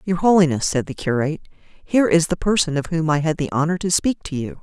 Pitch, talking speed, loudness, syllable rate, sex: 165 Hz, 245 wpm, -19 LUFS, 6.0 syllables/s, female